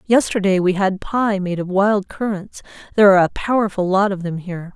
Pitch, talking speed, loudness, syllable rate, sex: 195 Hz, 200 wpm, -18 LUFS, 5.6 syllables/s, female